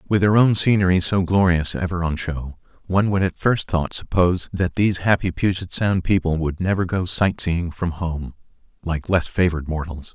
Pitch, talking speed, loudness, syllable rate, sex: 90 Hz, 185 wpm, -21 LUFS, 5.1 syllables/s, male